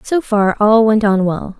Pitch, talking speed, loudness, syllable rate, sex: 215 Hz, 225 wpm, -14 LUFS, 4.0 syllables/s, female